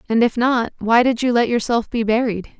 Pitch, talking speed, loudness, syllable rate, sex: 230 Hz, 230 wpm, -18 LUFS, 5.1 syllables/s, female